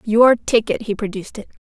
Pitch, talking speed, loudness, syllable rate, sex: 220 Hz, 180 wpm, -17 LUFS, 5.7 syllables/s, female